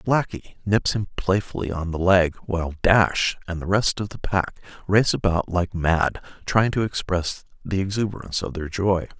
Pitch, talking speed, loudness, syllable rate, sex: 95 Hz, 175 wpm, -23 LUFS, 4.7 syllables/s, male